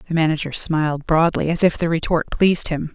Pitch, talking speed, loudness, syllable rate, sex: 160 Hz, 205 wpm, -19 LUFS, 5.9 syllables/s, female